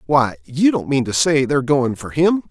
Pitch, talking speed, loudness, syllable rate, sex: 140 Hz, 240 wpm, -18 LUFS, 5.0 syllables/s, male